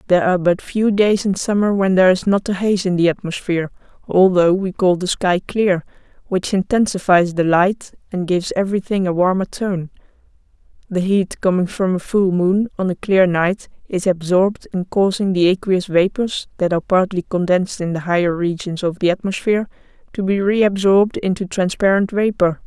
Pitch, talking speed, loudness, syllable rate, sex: 190 Hz, 175 wpm, -17 LUFS, 5.3 syllables/s, female